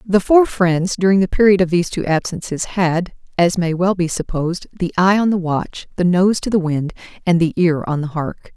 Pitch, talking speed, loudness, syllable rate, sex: 180 Hz, 225 wpm, -17 LUFS, 5.1 syllables/s, female